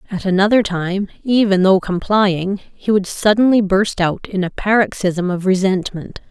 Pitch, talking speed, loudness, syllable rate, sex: 195 Hz, 150 wpm, -16 LUFS, 4.5 syllables/s, female